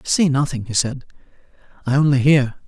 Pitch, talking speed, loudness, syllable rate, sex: 135 Hz, 180 wpm, -18 LUFS, 5.8 syllables/s, male